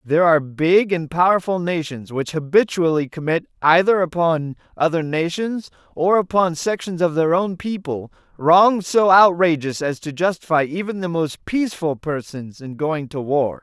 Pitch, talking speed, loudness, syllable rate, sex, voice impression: 165 Hz, 155 wpm, -19 LUFS, 4.7 syllables/s, male, masculine, adult-like, slightly relaxed, powerful, raspy, slightly friendly, wild, lively, strict, intense, sharp